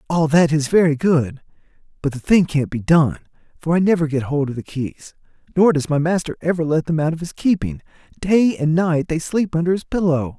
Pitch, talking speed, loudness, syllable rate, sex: 160 Hz, 220 wpm, -19 LUFS, 5.4 syllables/s, male